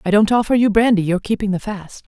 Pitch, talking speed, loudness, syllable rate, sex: 205 Hz, 250 wpm, -17 LUFS, 6.6 syllables/s, female